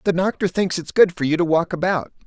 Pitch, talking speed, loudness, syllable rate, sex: 175 Hz, 265 wpm, -20 LUFS, 5.9 syllables/s, male